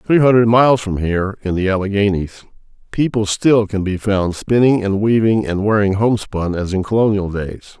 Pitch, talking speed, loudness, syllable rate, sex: 105 Hz, 175 wpm, -16 LUFS, 5.2 syllables/s, male